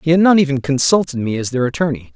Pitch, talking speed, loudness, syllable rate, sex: 150 Hz, 250 wpm, -16 LUFS, 6.8 syllables/s, male